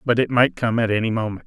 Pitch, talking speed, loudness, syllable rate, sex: 115 Hz, 285 wpm, -20 LUFS, 6.3 syllables/s, male